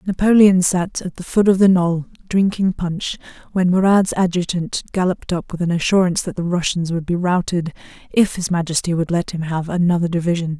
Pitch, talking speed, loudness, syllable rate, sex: 175 Hz, 185 wpm, -18 LUFS, 5.5 syllables/s, female